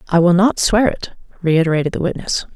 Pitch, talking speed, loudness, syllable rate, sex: 180 Hz, 190 wpm, -16 LUFS, 5.7 syllables/s, female